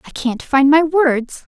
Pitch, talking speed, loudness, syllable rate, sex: 285 Hz, 195 wpm, -15 LUFS, 3.6 syllables/s, female